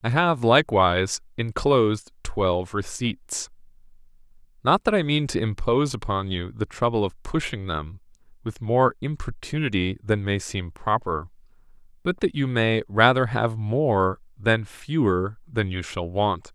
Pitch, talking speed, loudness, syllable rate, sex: 115 Hz, 140 wpm, -24 LUFS, 4.3 syllables/s, male